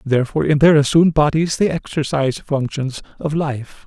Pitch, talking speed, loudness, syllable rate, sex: 145 Hz, 155 wpm, -17 LUFS, 5.5 syllables/s, male